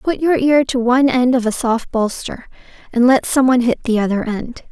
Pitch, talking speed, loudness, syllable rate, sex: 245 Hz, 230 wpm, -16 LUFS, 5.4 syllables/s, female